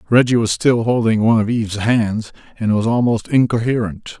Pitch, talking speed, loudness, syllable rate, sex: 115 Hz, 170 wpm, -17 LUFS, 5.3 syllables/s, male